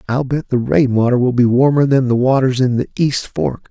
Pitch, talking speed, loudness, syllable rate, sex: 125 Hz, 225 wpm, -15 LUFS, 5.3 syllables/s, male